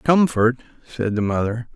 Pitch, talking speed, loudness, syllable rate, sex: 120 Hz, 135 wpm, -20 LUFS, 4.6 syllables/s, male